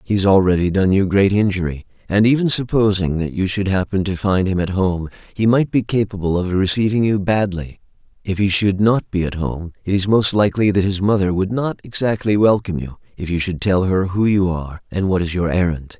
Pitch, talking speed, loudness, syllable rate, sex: 95 Hz, 220 wpm, -18 LUFS, 5.5 syllables/s, male